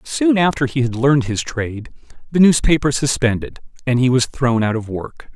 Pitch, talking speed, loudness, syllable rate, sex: 130 Hz, 190 wpm, -17 LUFS, 5.3 syllables/s, male